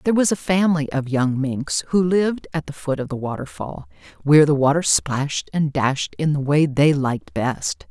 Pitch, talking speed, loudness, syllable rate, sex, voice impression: 140 Hz, 205 wpm, -20 LUFS, 5.1 syllables/s, female, feminine, slightly gender-neutral, very adult-like, middle-aged, thin, slightly tensed, slightly powerful, slightly dark, hard, clear, fluent, slightly raspy, cool, very intellectual, refreshing, sincere, calm, friendly, reassuring, unique, very elegant, slightly wild, slightly sweet, lively, kind, slightly intense, slightly sharp, slightly light